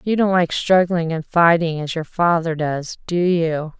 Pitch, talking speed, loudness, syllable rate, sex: 170 Hz, 190 wpm, -19 LUFS, 4.2 syllables/s, female